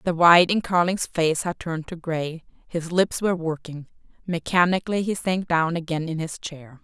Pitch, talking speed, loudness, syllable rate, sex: 170 Hz, 175 wpm, -23 LUFS, 5.1 syllables/s, female